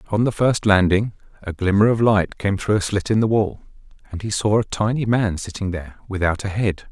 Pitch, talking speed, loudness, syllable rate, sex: 100 Hz, 225 wpm, -20 LUFS, 5.5 syllables/s, male